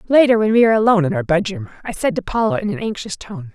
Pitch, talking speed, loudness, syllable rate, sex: 220 Hz, 270 wpm, -17 LUFS, 7.2 syllables/s, female